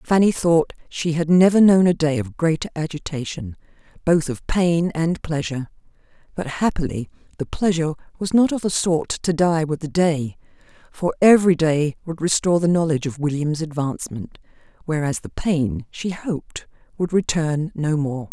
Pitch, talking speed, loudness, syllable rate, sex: 160 Hz, 160 wpm, -20 LUFS, 5.0 syllables/s, female